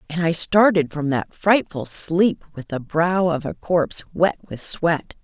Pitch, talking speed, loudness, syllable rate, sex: 165 Hz, 185 wpm, -21 LUFS, 4.1 syllables/s, female